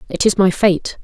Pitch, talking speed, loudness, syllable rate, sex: 190 Hz, 230 wpm, -15 LUFS, 4.8 syllables/s, female